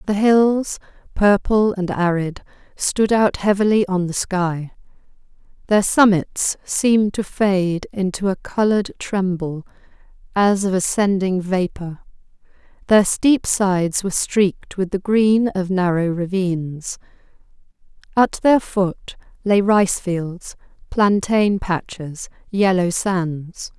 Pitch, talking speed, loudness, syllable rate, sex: 190 Hz, 115 wpm, -19 LUFS, 3.7 syllables/s, female